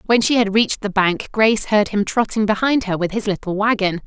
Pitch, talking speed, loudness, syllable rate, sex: 210 Hz, 235 wpm, -18 LUFS, 5.7 syllables/s, female